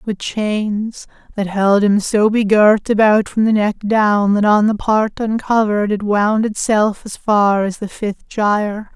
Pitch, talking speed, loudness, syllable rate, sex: 210 Hz, 175 wpm, -16 LUFS, 4.0 syllables/s, female